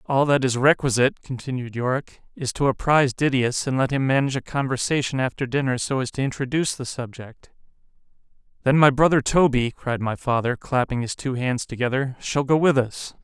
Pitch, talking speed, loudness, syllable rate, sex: 130 Hz, 175 wpm, -22 LUFS, 5.6 syllables/s, male